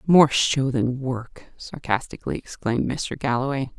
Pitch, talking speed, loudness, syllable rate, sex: 130 Hz, 125 wpm, -23 LUFS, 4.5 syllables/s, female